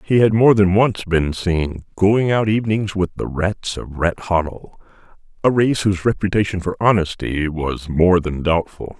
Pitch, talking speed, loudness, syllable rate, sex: 95 Hz, 165 wpm, -18 LUFS, 4.5 syllables/s, male